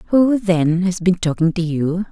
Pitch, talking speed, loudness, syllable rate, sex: 180 Hz, 200 wpm, -17 LUFS, 3.9 syllables/s, female